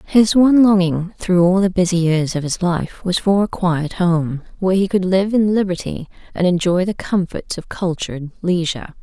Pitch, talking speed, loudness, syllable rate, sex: 180 Hz, 195 wpm, -17 LUFS, 4.9 syllables/s, female